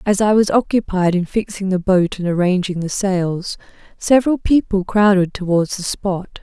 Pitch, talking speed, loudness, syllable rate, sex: 190 Hz, 170 wpm, -17 LUFS, 4.7 syllables/s, female